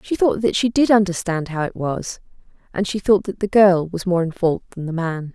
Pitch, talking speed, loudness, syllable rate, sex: 185 Hz, 245 wpm, -19 LUFS, 5.2 syllables/s, female